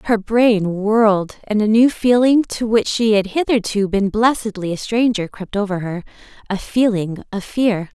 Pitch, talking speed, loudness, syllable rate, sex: 215 Hz, 175 wpm, -17 LUFS, 4.5 syllables/s, female